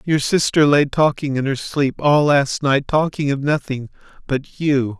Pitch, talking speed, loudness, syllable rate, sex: 140 Hz, 180 wpm, -18 LUFS, 4.2 syllables/s, male